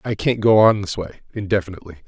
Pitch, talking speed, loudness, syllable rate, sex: 100 Hz, 200 wpm, -18 LUFS, 7.6 syllables/s, male